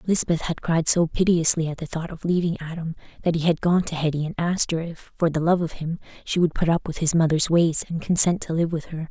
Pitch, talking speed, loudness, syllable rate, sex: 165 Hz, 265 wpm, -23 LUFS, 5.9 syllables/s, female